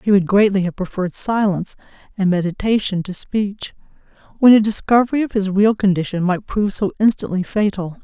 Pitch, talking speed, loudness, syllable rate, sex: 200 Hz, 165 wpm, -18 LUFS, 5.8 syllables/s, female